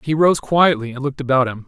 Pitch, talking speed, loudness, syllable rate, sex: 140 Hz, 250 wpm, -17 LUFS, 6.4 syllables/s, male